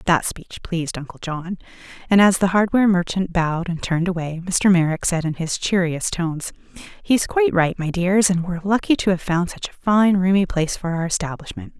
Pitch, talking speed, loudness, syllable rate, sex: 180 Hz, 205 wpm, -20 LUFS, 5.6 syllables/s, female